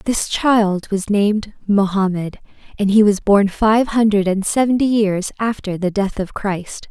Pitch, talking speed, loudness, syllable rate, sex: 205 Hz, 165 wpm, -17 LUFS, 4.2 syllables/s, female